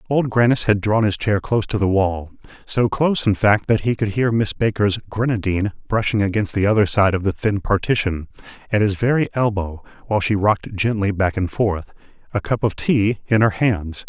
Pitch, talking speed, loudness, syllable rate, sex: 105 Hz, 200 wpm, -19 LUFS, 5.3 syllables/s, male